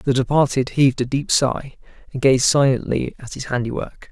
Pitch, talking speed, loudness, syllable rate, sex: 130 Hz, 175 wpm, -19 LUFS, 5.2 syllables/s, male